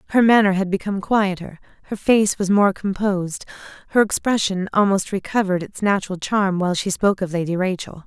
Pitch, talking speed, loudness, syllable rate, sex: 195 Hz, 170 wpm, -20 LUFS, 5.9 syllables/s, female